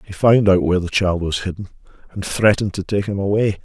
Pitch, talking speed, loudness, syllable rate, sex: 95 Hz, 230 wpm, -18 LUFS, 6.2 syllables/s, male